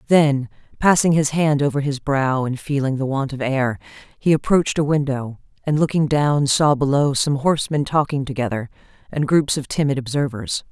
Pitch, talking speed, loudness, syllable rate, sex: 140 Hz, 175 wpm, -19 LUFS, 5.1 syllables/s, female